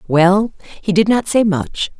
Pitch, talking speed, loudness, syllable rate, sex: 195 Hz, 180 wpm, -16 LUFS, 3.8 syllables/s, female